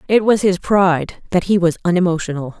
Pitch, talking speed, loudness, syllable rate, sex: 180 Hz, 185 wpm, -16 LUFS, 5.8 syllables/s, female